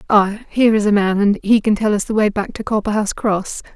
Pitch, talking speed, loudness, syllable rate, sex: 210 Hz, 240 wpm, -17 LUFS, 6.2 syllables/s, female